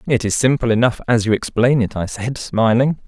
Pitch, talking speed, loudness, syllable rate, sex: 120 Hz, 215 wpm, -17 LUFS, 5.4 syllables/s, male